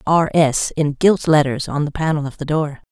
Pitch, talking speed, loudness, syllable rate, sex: 150 Hz, 225 wpm, -18 LUFS, 4.8 syllables/s, female